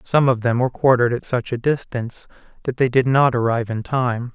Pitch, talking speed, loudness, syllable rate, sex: 125 Hz, 220 wpm, -19 LUFS, 5.9 syllables/s, male